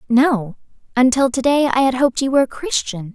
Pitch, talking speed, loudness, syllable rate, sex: 255 Hz, 210 wpm, -17 LUFS, 5.8 syllables/s, female